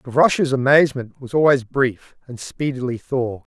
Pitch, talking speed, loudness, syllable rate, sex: 130 Hz, 135 wpm, -19 LUFS, 5.4 syllables/s, male